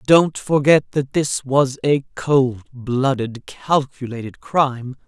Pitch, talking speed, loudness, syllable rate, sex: 135 Hz, 120 wpm, -19 LUFS, 3.6 syllables/s, female